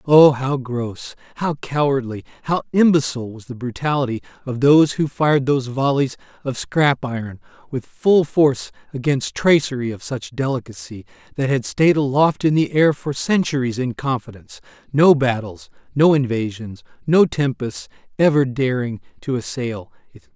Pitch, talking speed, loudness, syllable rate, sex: 135 Hz, 145 wpm, -19 LUFS, 5.0 syllables/s, male